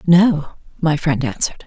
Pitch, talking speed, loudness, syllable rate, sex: 160 Hz, 145 wpm, -18 LUFS, 5.1 syllables/s, female